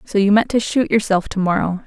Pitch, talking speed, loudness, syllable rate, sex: 205 Hz, 255 wpm, -17 LUFS, 5.7 syllables/s, female